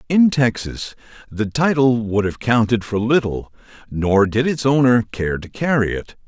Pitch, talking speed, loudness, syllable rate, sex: 115 Hz, 165 wpm, -18 LUFS, 4.3 syllables/s, male